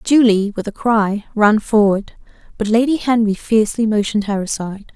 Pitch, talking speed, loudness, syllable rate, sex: 215 Hz, 155 wpm, -16 LUFS, 5.3 syllables/s, female